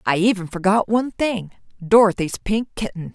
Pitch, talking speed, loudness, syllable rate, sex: 200 Hz, 155 wpm, -20 LUFS, 5.3 syllables/s, female